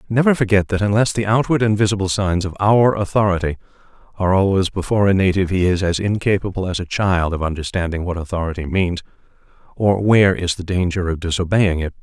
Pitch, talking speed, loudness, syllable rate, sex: 95 Hz, 185 wpm, -18 LUFS, 6.2 syllables/s, male